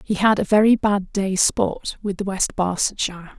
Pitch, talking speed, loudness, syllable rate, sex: 200 Hz, 195 wpm, -20 LUFS, 4.6 syllables/s, female